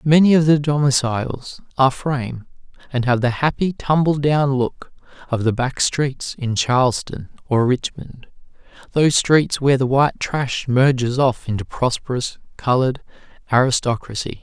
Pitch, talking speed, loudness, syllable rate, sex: 130 Hz, 130 wpm, -19 LUFS, 4.8 syllables/s, male